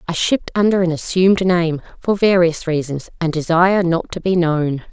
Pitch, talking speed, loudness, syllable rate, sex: 170 Hz, 185 wpm, -17 LUFS, 5.2 syllables/s, female